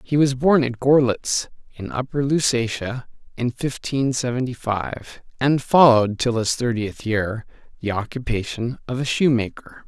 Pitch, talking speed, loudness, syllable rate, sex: 125 Hz, 140 wpm, -21 LUFS, 4.4 syllables/s, male